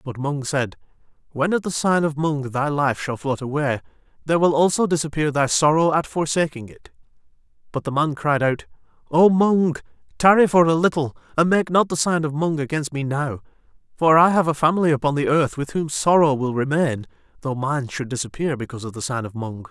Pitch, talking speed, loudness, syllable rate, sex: 150 Hz, 205 wpm, -20 LUFS, 5.5 syllables/s, male